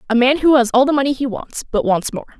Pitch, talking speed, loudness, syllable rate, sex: 260 Hz, 300 wpm, -16 LUFS, 6.4 syllables/s, female